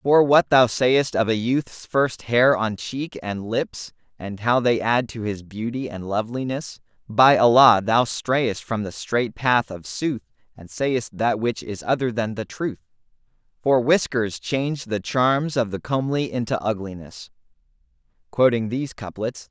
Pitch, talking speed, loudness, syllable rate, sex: 115 Hz, 170 wpm, -22 LUFS, 4.1 syllables/s, male